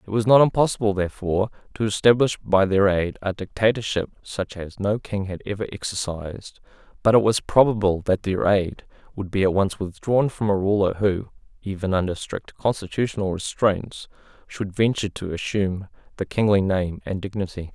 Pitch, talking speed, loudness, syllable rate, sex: 100 Hz, 165 wpm, -22 LUFS, 5.3 syllables/s, male